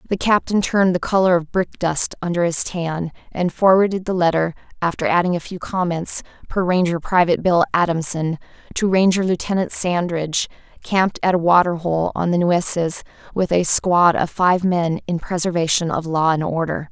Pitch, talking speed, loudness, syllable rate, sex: 175 Hz, 175 wpm, -19 LUFS, 5.2 syllables/s, female